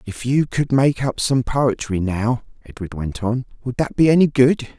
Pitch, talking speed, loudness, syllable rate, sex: 125 Hz, 200 wpm, -19 LUFS, 4.5 syllables/s, male